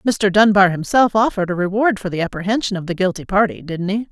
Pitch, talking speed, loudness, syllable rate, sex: 195 Hz, 220 wpm, -17 LUFS, 6.2 syllables/s, female